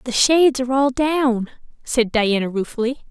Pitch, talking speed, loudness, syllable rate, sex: 250 Hz, 155 wpm, -18 LUFS, 4.9 syllables/s, female